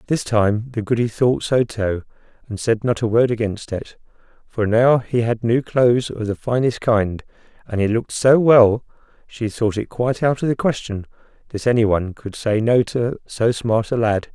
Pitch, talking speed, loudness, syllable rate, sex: 115 Hz, 195 wpm, -19 LUFS, 4.7 syllables/s, male